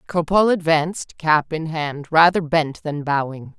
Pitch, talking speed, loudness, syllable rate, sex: 160 Hz, 150 wpm, -19 LUFS, 4.4 syllables/s, female